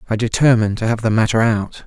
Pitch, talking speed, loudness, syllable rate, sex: 115 Hz, 225 wpm, -16 LUFS, 6.6 syllables/s, male